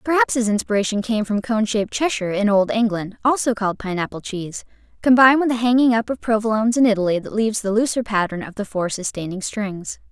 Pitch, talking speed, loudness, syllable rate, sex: 220 Hz, 200 wpm, -20 LUFS, 6.3 syllables/s, female